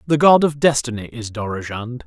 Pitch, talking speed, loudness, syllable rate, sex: 125 Hz, 175 wpm, -18 LUFS, 5.2 syllables/s, male